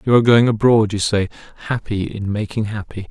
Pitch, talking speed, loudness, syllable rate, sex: 110 Hz, 195 wpm, -18 LUFS, 5.8 syllables/s, male